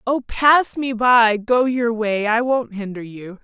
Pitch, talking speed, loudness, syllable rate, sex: 230 Hz, 190 wpm, -17 LUFS, 3.7 syllables/s, female